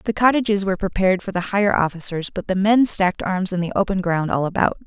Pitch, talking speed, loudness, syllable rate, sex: 190 Hz, 235 wpm, -20 LUFS, 6.5 syllables/s, female